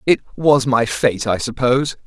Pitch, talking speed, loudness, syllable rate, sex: 125 Hz, 175 wpm, -17 LUFS, 4.7 syllables/s, male